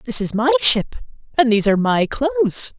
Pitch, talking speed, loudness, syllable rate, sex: 260 Hz, 195 wpm, -17 LUFS, 6.9 syllables/s, female